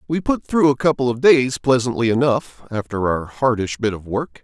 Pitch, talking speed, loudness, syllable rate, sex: 130 Hz, 205 wpm, -19 LUFS, 5.0 syllables/s, male